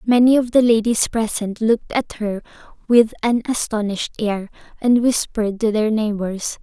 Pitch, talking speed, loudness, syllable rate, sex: 220 Hz, 155 wpm, -19 LUFS, 4.9 syllables/s, female